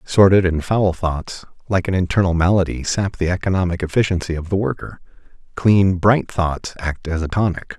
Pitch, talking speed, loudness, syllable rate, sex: 90 Hz, 170 wpm, -19 LUFS, 5.1 syllables/s, male